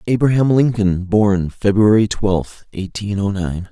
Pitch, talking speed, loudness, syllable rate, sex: 100 Hz, 130 wpm, -16 LUFS, 4.0 syllables/s, male